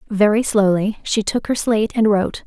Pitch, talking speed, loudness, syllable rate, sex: 210 Hz, 195 wpm, -18 LUFS, 5.5 syllables/s, female